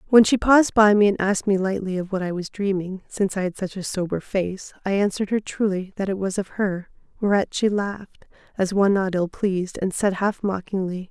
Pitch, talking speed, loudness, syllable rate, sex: 195 Hz, 220 wpm, -22 LUFS, 5.6 syllables/s, female